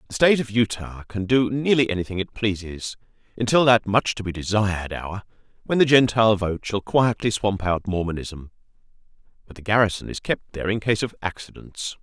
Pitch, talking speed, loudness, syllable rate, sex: 105 Hz, 180 wpm, -22 LUFS, 5.6 syllables/s, male